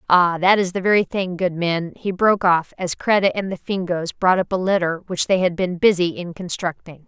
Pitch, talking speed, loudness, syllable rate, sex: 180 Hz, 230 wpm, -20 LUFS, 5.2 syllables/s, female